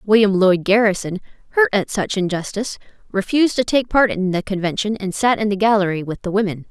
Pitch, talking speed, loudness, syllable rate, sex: 205 Hz, 195 wpm, -18 LUFS, 5.9 syllables/s, female